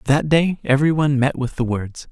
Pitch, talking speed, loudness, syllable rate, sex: 140 Hz, 200 wpm, -19 LUFS, 5.2 syllables/s, male